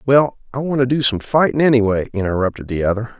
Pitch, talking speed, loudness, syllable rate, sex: 120 Hz, 190 wpm, -17 LUFS, 6.4 syllables/s, male